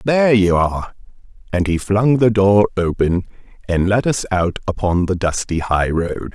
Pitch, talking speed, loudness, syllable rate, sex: 100 Hz, 170 wpm, -17 LUFS, 4.5 syllables/s, male